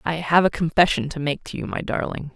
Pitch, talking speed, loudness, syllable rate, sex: 155 Hz, 255 wpm, -22 LUFS, 5.9 syllables/s, female